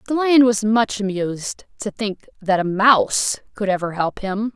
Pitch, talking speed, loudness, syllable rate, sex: 210 Hz, 185 wpm, -19 LUFS, 4.5 syllables/s, female